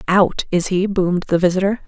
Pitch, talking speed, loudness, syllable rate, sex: 185 Hz, 190 wpm, -18 LUFS, 5.6 syllables/s, female